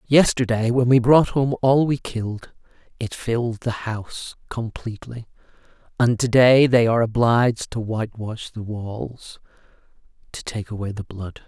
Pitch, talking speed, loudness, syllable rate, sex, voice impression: 115 Hz, 150 wpm, -21 LUFS, 4.6 syllables/s, male, masculine, slightly young, slightly thick, slightly tensed, weak, dark, slightly soft, slightly muffled, slightly fluent, cool, intellectual, refreshing, very sincere, very calm, very friendly, very reassuring, unique, slightly elegant, wild, sweet, lively, kind, slightly modest